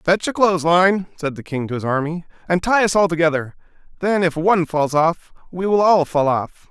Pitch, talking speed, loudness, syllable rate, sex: 170 Hz, 215 wpm, -18 LUFS, 5.5 syllables/s, male